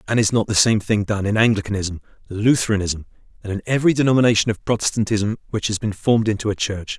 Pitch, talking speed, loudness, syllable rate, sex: 105 Hz, 190 wpm, -19 LUFS, 6.5 syllables/s, male